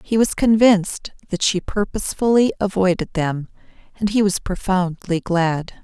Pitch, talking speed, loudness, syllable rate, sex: 190 Hz, 135 wpm, -19 LUFS, 4.4 syllables/s, female